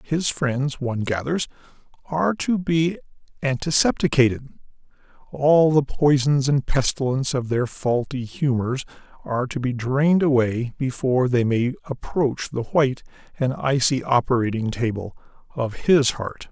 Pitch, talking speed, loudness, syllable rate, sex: 135 Hz, 125 wpm, -22 LUFS, 4.5 syllables/s, male